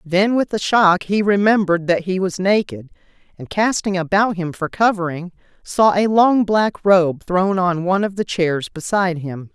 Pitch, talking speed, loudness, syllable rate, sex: 185 Hz, 180 wpm, -17 LUFS, 4.6 syllables/s, female